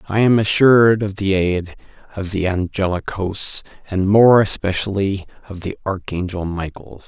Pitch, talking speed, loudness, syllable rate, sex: 100 Hz, 145 wpm, -18 LUFS, 4.6 syllables/s, male